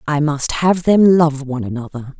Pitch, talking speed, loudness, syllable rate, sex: 150 Hz, 190 wpm, -16 LUFS, 4.9 syllables/s, female